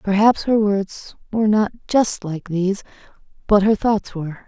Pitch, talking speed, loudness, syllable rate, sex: 205 Hz, 160 wpm, -19 LUFS, 4.7 syllables/s, female